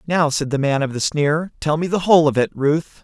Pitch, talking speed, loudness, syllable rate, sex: 150 Hz, 275 wpm, -18 LUFS, 5.3 syllables/s, male